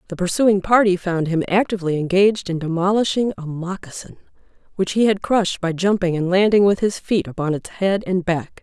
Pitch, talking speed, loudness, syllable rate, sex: 185 Hz, 190 wpm, -19 LUFS, 5.5 syllables/s, female